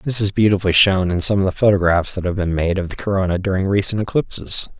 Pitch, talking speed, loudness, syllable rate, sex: 95 Hz, 240 wpm, -17 LUFS, 6.4 syllables/s, male